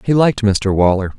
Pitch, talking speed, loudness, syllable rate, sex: 105 Hz, 205 wpm, -15 LUFS, 5.8 syllables/s, male